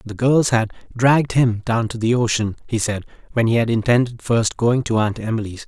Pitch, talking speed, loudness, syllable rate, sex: 115 Hz, 210 wpm, -19 LUFS, 5.3 syllables/s, male